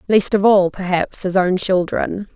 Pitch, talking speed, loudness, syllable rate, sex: 190 Hz, 180 wpm, -17 LUFS, 4.2 syllables/s, female